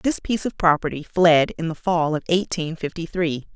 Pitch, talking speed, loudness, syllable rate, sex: 165 Hz, 205 wpm, -21 LUFS, 5.3 syllables/s, female